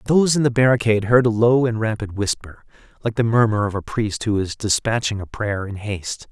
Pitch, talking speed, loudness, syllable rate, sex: 110 Hz, 220 wpm, -20 LUFS, 5.7 syllables/s, male